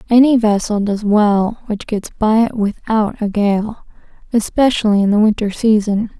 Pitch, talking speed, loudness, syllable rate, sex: 215 Hz, 155 wpm, -15 LUFS, 4.4 syllables/s, female